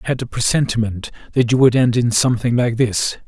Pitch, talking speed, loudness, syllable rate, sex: 120 Hz, 220 wpm, -17 LUFS, 5.9 syllables/s, male